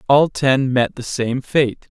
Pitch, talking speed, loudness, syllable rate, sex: 130 Hz, 180 wpm, -18 LUFS, 3.5 syllables/s, male